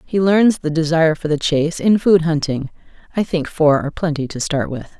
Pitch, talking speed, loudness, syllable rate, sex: 160 Hz, 215 wpm, -17 LUFS, 5.5 syllables/s, female